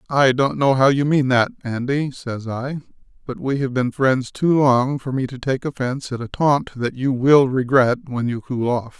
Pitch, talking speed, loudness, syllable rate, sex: 130 Hz, 220 wpm, -19 LUFS, 4.7 syllables/s, male